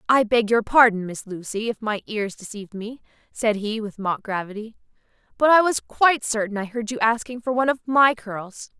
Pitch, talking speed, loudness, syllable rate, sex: 225 Hz, 205 wpm, -22 LUFS, 5.3 syllables/s, female